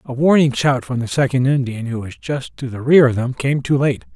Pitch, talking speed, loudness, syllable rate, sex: 130 Hz, 260 wpm, -17 LUFS, 5.3 syllables/s, male